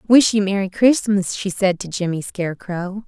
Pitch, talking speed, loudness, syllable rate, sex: 195 Hz, 175 wpm, -19 LUFS, 4.6 syllables/s, female